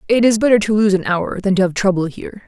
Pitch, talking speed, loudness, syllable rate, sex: 200 Hz, 290 wpm, -16 LUFS, 6.6 syllables/s, female